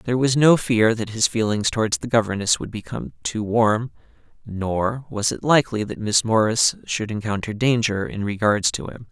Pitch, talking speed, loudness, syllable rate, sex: 110 Hz, 180 wpm, -21 LUFS, 5.0 syllables/s, male